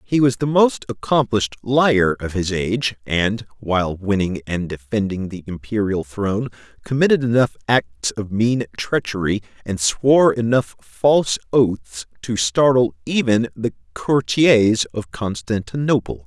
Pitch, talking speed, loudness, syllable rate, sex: 110 Hz, 130 wpm, -19 LUFS, 4.3 syllables/s, male